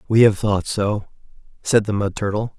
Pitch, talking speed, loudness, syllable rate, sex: 105 Hz, 185 wpm, -20 LUFS, 4.8 syllables/s, male